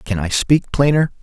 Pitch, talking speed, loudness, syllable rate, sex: 125 Hz, 195 wpm, -16 LUFS, 4.7 syllables/s, male